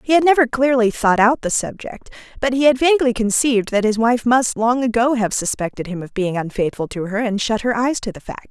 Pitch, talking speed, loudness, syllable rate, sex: 230 Hz, 240 wpm, -18 LUFS, 5.7 syllables/s, female